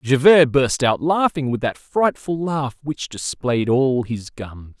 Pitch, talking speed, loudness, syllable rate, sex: 135 Hz, 165 wpm, -19 LUFS, 3.7 syllables/s, male